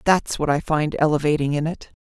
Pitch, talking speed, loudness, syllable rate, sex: 150 Hz, 205 wpm, -21 LUFS, 5.6 syllables/s, female